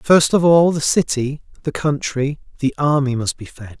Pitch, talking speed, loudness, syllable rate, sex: 140 Hz, 190 wpm, -18 LUFS, 4.6 syllables/s, male